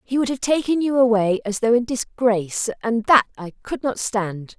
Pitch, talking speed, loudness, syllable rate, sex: 230 Hz, 210 wpm, -20 LUFS, 5.0 syllables/s, female